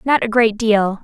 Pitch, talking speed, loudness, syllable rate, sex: 220 Hz, 230 wpm, -16 LUFS, 4.3 syllables/s, female